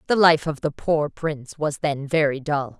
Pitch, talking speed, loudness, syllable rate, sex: 150 Hz, 215 wpm, -22 LUFS, 4.7 syllables/s, female